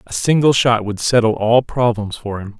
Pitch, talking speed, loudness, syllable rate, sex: 115 Hz, 210 wpm, -16 LUFS, 4.9 syllables/s, male